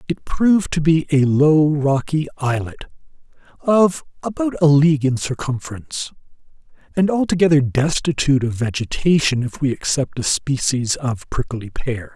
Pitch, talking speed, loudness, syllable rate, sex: 140 Hz, 135 wpm, -18 LUFS, 4.8 syllables/s, male